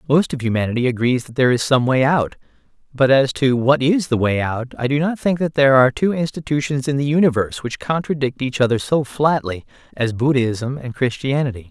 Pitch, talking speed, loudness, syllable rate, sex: 135 Hz, 205 wpm, -18 LUFS, 5.8 syllables/s, male